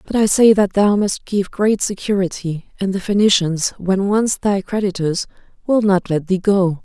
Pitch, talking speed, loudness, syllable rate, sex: 195 Hz, 185 wpm, -17 LUFS, 4.6 syllables/s, female